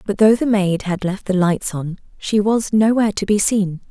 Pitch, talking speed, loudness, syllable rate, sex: 200 Hz, 230 wpm, -17 LUFS, 4.8 syllables/s, female